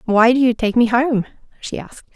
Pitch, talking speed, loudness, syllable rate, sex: 235 Hz, 225 wpm, -16 LUFS, 5.5 syllables/s, female